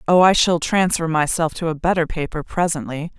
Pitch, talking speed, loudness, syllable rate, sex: 165 Hz, 190 wpm, -19 LUFS, 5.4 syllables/s, female